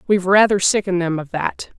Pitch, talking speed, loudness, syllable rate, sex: 185 Hz, 200 wpm, -17 LUFS, 6.4 syllables/s, female